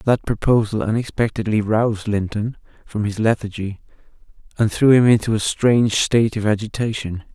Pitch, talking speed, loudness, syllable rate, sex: 110 Hz, 140 wpm, -19 LUFS, 5.4 syllables/s, male